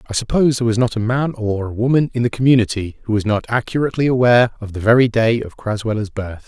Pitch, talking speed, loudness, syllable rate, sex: 115 Hz, 220 wpm, -17 LUFS, 6.6 syllables/s, male